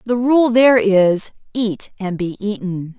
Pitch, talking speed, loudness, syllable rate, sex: 210 Hz, 140 wpm, -16 LUFS, 4.0 syllables/s, female